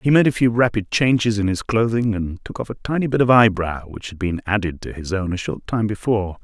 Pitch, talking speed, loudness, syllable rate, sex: 105 Hz, 260 wpm, -20 LUFS, 5.8 syllables/s, male